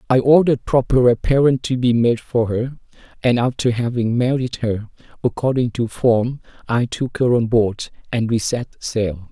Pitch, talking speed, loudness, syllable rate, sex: 120 Hz, 165 wpm, -18 LUFS, 4.6 syllables/s, male